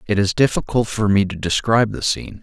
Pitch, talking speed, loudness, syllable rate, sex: 105 Hz, 225 wpm, -18 LUFS, 6.1 syllables/s, male